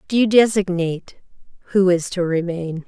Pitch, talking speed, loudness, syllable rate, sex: 185 Hz, 145 wpm, -19 LUFS, 5.0 syllables/s, female